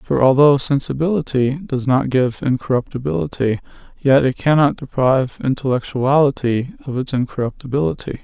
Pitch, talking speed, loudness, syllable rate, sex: 135 Hz, 110 wpm, -18 LUFS, 5.3 syllables/s, male